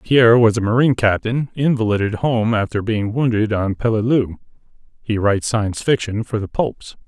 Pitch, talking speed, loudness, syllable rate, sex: 110 Hz, 160 wpm, -18 LUFS, 5.3 syllables/s, male